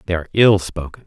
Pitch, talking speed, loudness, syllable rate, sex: 90 Hz, 225 wpm, -16 LUFS, 7.1 syllables/s, male